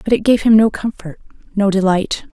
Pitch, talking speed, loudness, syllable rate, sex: 205 Hz, 200 wpm, -15 LUFS, 5.4 syllables/s, female